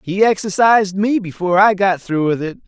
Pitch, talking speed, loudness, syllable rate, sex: 195 Hz, 200 wpm, -15 LUFS, 5.6 syllables/s, male